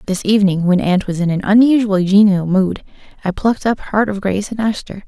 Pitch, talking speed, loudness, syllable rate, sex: 200 Hz, 225 wpm, -15 LUFS, 6.3 syllables/s, female